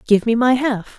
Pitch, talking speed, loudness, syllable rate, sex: 235 Hz, 245 wpm, -17 LUFS, 4.7 syllables/s, female